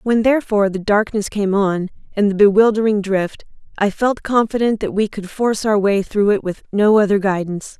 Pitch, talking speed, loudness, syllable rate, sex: 205 Hz, 195 wpm, -17 LUFS, 5.4 syllables/s, female